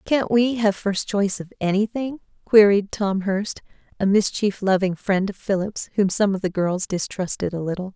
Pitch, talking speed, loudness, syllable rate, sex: 200 Hz, 180 wpm, -21 LUFS, 4.8 syllables/s, female